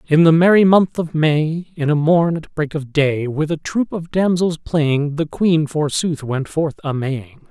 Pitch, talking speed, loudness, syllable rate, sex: 155 Hz, 210 wpm, -17 LUFS, 4.0 syllables/s, male